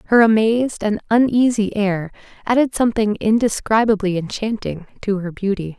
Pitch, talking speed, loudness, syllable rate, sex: 215 Hz, 125 wpm, -18 LUFS, 5.2 syllables/s, female